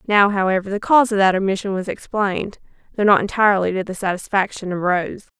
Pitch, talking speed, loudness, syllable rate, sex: 195 Hz, 190 wpm, -19 LUFS, 6.2 syllables/s, female